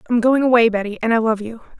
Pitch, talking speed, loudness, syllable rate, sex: 230 Hz, 270 wpm, -17 LUFS, 6.9 syllables/s, female